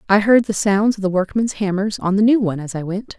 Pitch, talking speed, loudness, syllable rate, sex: 200 Hz, 285 wpm, -18 LUFS, 6.0 syllables/s, female